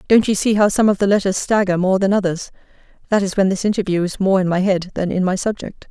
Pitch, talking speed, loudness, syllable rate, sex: 195 Hz, 255 wpm, -17 LUFS, 6.3 syllables/s, female